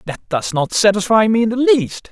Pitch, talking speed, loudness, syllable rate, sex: 210 Hz, 225 wpm, -15 LUFS, 5.1 syllables/s, male